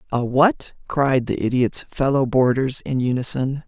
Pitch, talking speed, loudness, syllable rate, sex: 130 Hz, 145 wpm, -20 LUFS, 4.3 syllables/s, female